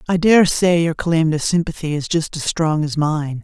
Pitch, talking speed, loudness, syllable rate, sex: 165 Hz, 225 wpm, -17 LUFS, 4.6 syllables/s, female